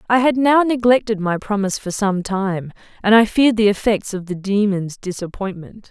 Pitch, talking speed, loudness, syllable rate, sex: 205 Hz, 185 wpm, -18 LUFS, 5.2 syllables/s, female